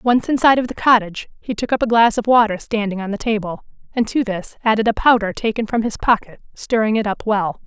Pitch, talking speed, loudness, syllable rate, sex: 220 Hz, 235 wpm, -18 LUFS, 6.1 syllables/s, female